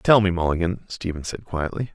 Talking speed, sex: 185 wpm, male